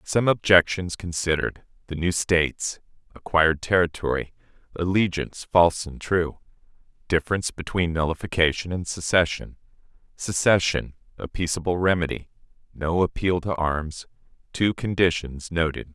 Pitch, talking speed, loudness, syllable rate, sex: 85 Hz, 80 wpm, -23 LUFS, 5.2 syllables/s, male